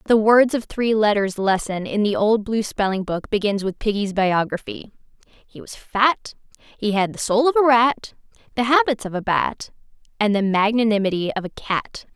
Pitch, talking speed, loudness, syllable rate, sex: 210 Hz, 185 wpm, -20 LUFS, 4.8 syllables/s, female